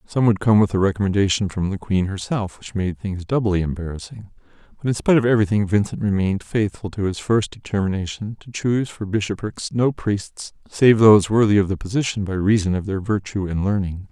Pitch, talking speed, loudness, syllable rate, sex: 100 Hz, 195 wpm, -20 LUFS, 5.9 syllables/s, male